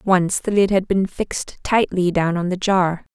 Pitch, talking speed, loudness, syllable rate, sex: 185 Hz, 210 wpm, -19 LUFS, 4.4 syllables/s, female